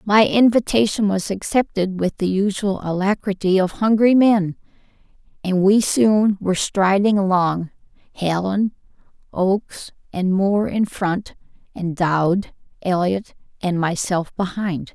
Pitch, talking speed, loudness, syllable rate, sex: 195 Hz, 110 wpm, -19 LUFS, 4.1 syllables/s, female